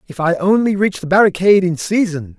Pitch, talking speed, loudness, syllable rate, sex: 185 Hz, 200 wpm, -15 LUFS, 5.8 syllables/s, male